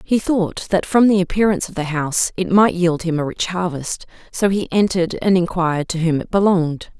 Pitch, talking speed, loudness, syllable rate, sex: 180 Hz, 215 wpm, -18 LUFS, 5.5 syllables/s, female